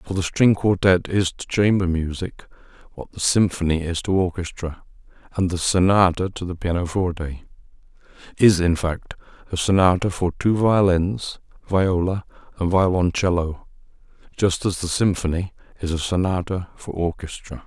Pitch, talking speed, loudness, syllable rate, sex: 90 Hz, 130 wpm, -21 LUFS, 4.8 syllables/s, male